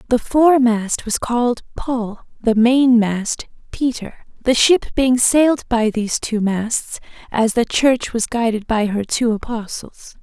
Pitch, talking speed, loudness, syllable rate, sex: 235 Hz, 140 wpm, -17 LUFS, 4.1 syllables/s, female